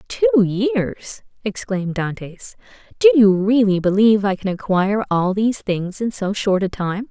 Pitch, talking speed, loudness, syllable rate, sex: 200 Hz, 160 wpm, -18 LUFS, 4.6 syllables/s, female